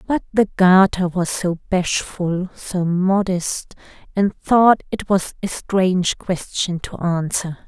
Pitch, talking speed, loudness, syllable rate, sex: 185 Hz, 135 wpm, -19 LUFS, 3.5 syllables/s, female